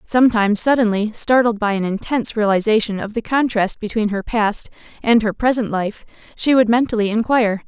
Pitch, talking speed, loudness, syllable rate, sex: 220 Hz, 165 wpm, -18 LUFS, 5.6 syllables/s, female